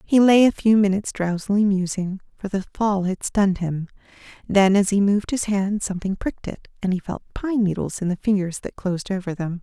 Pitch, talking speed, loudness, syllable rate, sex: 195 Hz, 210 wpm, -21 LUFS, 5.7 syllables/s, female